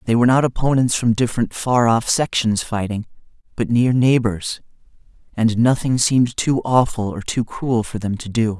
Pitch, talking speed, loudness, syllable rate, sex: 115 Hz, 175 wpm, -18 LUFS, 5.0 syllables/s, male